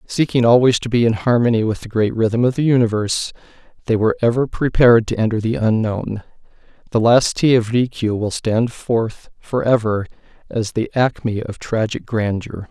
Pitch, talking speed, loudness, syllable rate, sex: 115 Hz, 170 wpm, -18 LUFS, 5.1 syllables/s, male